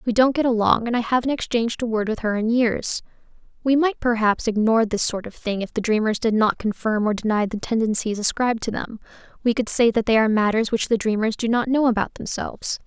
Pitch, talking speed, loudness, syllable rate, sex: 225 Hz, 235 wpm, -21 LUFS, 6.0 syllables/s, female